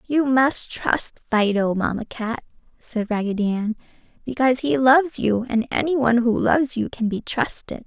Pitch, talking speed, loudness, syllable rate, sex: 240 Hz, 160 wpm, -21 LUFS, 4.8 syllables/s, female